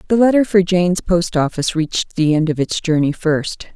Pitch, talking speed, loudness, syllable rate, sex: 175 Hz, 210 wpm, -16 LUFS, 5.5 syllables/s, female